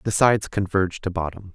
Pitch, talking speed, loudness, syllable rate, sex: 95 Hz, 195 wpm, -23 LUFS, 6.3 syllables/s, male